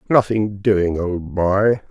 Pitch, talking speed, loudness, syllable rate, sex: 100 Hz, 125 wpm, -19 LUFS, 3.0 syllables/s, male